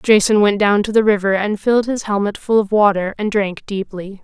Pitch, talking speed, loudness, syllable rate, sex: 205 Hz, 225 wpm, -16 LUFS, 5.3 syllables/s, female